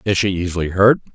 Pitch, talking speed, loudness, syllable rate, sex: 95 Hz, 210 wpm, -17 LUFS, 6.6 syllables/s, male